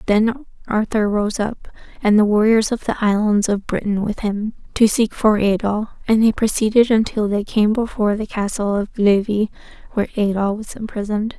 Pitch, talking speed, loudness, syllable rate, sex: 210 Hz, 175 wpm, -18 LUFS, 5.1 syllables/s, female